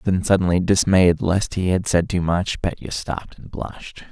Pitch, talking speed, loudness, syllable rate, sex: 90 Hz, 190 wpm, -20 LUFS, 4.8 syllables/s, male